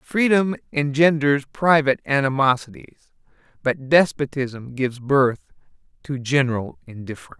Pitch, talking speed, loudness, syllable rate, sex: 140 Hz, 90 wpm, -20 LUFS, 4.7 syllables/s, male